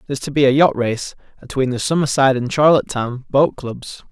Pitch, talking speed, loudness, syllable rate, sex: 135 Hz, 190 wpm, -17 LUFS, 5.8 syllables/s, male